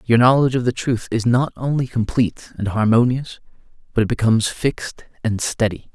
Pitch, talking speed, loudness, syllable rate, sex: 115 Hz, 170 wpm, -19 LUFS, 5.6 syllables/s, male